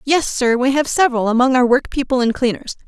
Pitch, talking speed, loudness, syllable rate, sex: 255 Hz, 210 wpm, -16 LUFS, 6.0 syllables/s, female